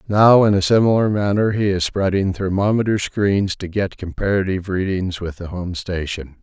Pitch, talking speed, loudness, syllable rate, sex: 95 Hz, 170 wpm, -19 LUFS, 5.0 syllables/s, male